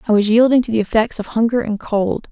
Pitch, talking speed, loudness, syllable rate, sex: 225 Hz, 260 wpm, -16 LUFS, 6.1 syllables/s, female